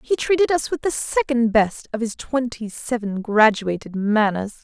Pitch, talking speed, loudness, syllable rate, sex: 235 Hz, 170 wpm, -21 LUFS, 4.5 syllables/s, female